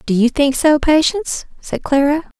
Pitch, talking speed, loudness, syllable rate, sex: 290 Hz, 175 wpm, -15 LUFS, 4.8 syllables/s, female